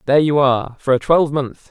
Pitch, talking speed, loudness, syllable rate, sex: 140 Hz, 210 wpm, -16 LUFS, 6.6 syllables/s, male